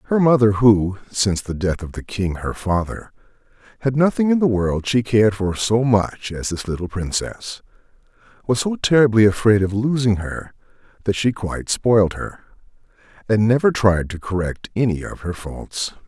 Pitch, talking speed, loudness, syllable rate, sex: 105 Hz, 170 wpm, -19 LUFS, 4.9 syllables/s, male